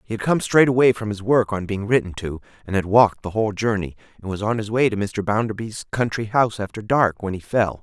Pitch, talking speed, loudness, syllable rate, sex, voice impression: 110 Hz, 255 wpm, -21 LUFS, 6.0 syllables/s, male, masculine, slightly young, adult-like, slightly thick, slightly tensed, slightly powerful, bright, hard, clear, fluent, slightly cool, slightly intellectual, slightly sincere, slightly calm, friendly, slightly reassuring, wild, lively, slightly kind